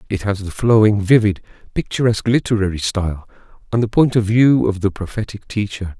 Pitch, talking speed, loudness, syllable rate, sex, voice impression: 105 Hz, 170 wpm, -17 LUFS, 5.8 syllables/s, male, masculine, adult-like, slightly weak, slightly muffled, calm, reassuring, slightly sweet, kind